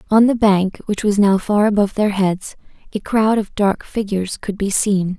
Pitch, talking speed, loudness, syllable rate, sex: 205 Hz, 210 wpm, -17 LUFS, 4.8 syllables/s, female